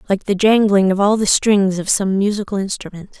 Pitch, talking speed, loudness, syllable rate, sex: 200 Hz, 205 wpm, -16 LUFS, 5.4 syllables/s, female